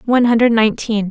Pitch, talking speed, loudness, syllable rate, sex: 225 Hz, 165 wpm, -14 LUFS, 7.2 syllables/s, female